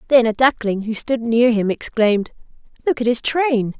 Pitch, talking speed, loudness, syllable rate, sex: 235 Hz, 190 wpm, -18 LUFS, 4.9 syllables/s, female